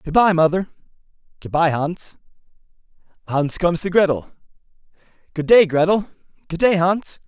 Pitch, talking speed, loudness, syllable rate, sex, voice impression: 175 Hz, 115 wpm, -18 LUFS, 5.1 syllables/s, male, masculine, adult-like, slightly middle-aged, thick, tensed, slightly powerful, bright, slightly hard, clear, very fluent, cool, intellectual, very refreshing, very sincere, slightly calm, slightly mature, friendly, reassuring, slightly elegant, wild, slightly sweet, very lively, intense